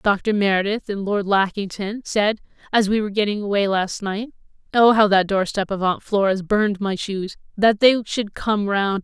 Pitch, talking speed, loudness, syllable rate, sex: 205 Hz, 175 wpm, -20 LUFS, 4.8 syllables/s, female